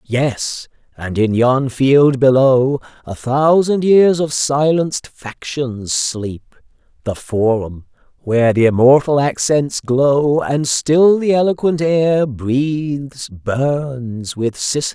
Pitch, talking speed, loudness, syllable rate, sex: 135 Hz, 110 wpm, -15 LUFS, 3.3 syllables/s, male